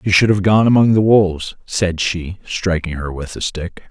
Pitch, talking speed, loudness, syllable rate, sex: 95 Hz, 215 wpm, -16 LUFS, 4.7 syllables/s, male